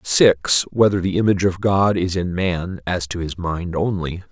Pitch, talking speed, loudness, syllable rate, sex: 90 Hz, 195 wpm, -19 LUFS, 4.9 syllables/s, male